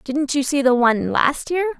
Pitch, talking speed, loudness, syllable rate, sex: 280 Hz, 235 wpm, -18 LUFS, 4.9 syllables/s, female